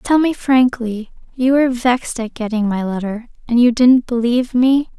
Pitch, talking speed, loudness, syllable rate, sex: 245 Hz, 180 wpm, -16 LUFS, 4.9 syllables/s, female